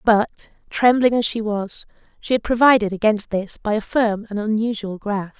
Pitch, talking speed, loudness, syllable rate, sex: 215 Hz, 180 wpm, -20 LUFS, 4.9 syllables/s, female